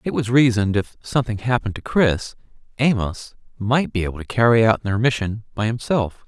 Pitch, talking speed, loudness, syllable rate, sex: 115 Hz, 180 wpm, -20 LUFS, 5.6 syllables/s, male